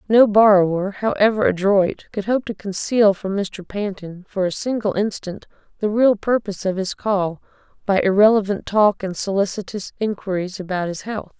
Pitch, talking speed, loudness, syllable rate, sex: 200 Hz, 160 wpm, -20 LUFS, 4.9 syllables/s, female